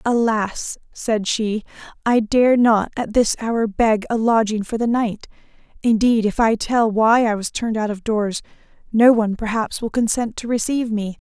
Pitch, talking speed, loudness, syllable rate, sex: 225 Hz, 180 wpm, -19 LUFS, 4.6 syllables/s, female